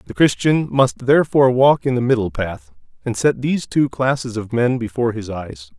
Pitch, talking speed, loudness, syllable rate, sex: 120 Hz, 195 wpm, -18 LUFS, 5.4 syllables/s, male